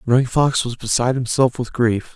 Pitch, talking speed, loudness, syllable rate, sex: 120 Hz, 195 wpm, -19 LUFS, 5.4 syllables/s, male